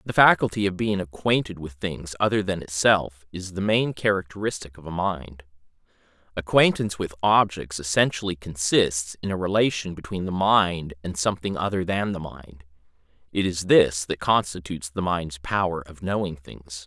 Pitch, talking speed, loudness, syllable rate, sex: 90 Hz, 160 wpm, -24 LUFS, 4.9 syllables/s, male